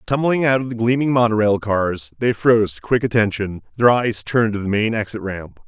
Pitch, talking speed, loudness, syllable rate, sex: 110 Hz, 210 wpm, -19 LUFS, 5.5 syllables/s, male